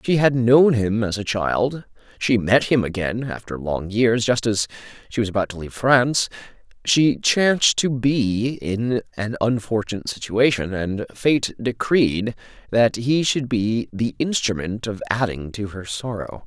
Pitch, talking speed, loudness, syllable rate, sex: 115 Hz, 160 wpm, -21 LUFS, 4.3 syllables/s, male